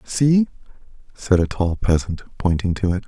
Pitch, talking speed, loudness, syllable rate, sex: 100 Hz, 155 wpm, -20 LUFS, 4.6 syllables/s, male